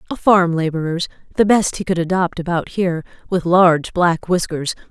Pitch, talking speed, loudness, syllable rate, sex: 175 Hz, 170 wpm, -17 LUFS, 5.2 syllables/s, female